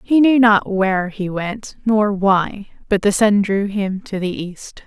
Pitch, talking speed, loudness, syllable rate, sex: 200 Hz, 195 wpm, -17 LUFS, 3.8 syllables/s, female